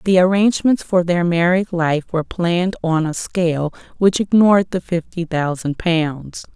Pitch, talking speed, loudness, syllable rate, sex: 175 Hz, 155 wpm, -18 LUFS, 4.6 syllables/s, female